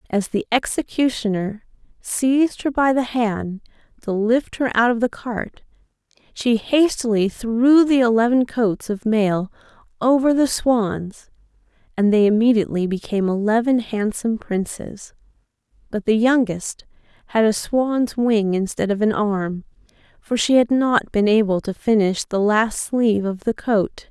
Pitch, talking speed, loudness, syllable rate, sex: 225 Hz, 145 wpm, -19 LUFS, 4.3 syllables/s, female